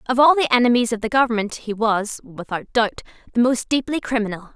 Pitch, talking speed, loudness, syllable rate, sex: 235 Hz, 200 wpm, -20 LUFS, 5.9 syllables/s, female